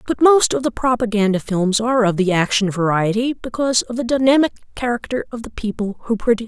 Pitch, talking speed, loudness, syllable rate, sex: 230 Hz, 205 wpm, -18 LUFS, 6.3 syllables/s, female